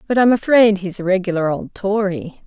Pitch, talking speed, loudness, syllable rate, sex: 200 Hz, 195 wpm, -17 LUFS, 5.2 syllables/s, female